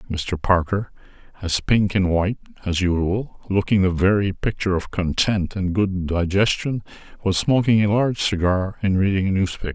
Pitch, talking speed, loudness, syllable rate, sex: 95 Hz, 160 wpm, -21 LUFS, 5.2 syllables/s, male